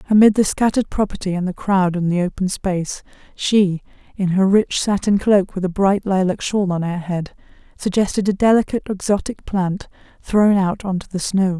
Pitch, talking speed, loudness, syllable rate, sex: 190 Hz, 180 wpm, -19 LUFS, 5.3 syllables/s, female